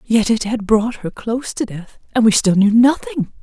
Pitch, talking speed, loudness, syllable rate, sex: 220 Hz, 210 wpm, -17 LUFS, 4.9 syllables/s, female